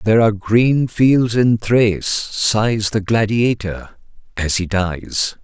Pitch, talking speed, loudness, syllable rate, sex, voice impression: 110 Hz, 130 wpm, -16 LUFS, 3.5 syllables/s, male, very masculine, very adult-like, very middle-aged, very thick, very tensed, powerful, slightly bright, slightly soft, slightly muffled, fluent, slightly raspy, very cool, intellectual, very sincere, very calm, very mature, friendly, reassuring, unique, elegant, wild, very sweet, slightly lively, kind